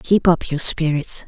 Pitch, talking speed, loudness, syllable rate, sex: 160 Hz, 190 wpm, -17 LUFS, 4.1 syllables/s, female